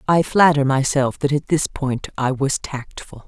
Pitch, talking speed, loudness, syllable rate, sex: 140 Hz, 185 wpm, -19 LUFS, 4.3 syllables/s, female